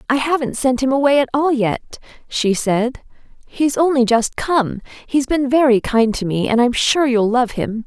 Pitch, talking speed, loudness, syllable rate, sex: 250 Hz, 200 wpm, -17 LUFS, 4.4 syllables/s, female